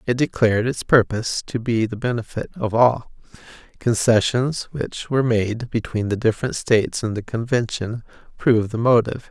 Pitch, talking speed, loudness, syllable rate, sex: 115 Hz, 155 wpm, -21 LUFS, 5.2 syllables/s, male